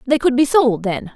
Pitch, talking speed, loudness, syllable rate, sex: 250 Hz, 260 wpm, -16 LUFS, 5.0 syllables/s, female